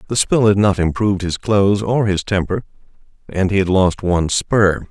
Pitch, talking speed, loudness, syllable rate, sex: 100 Hz, 195 wpm, -16 LUFS, 5.2 syllables/s, male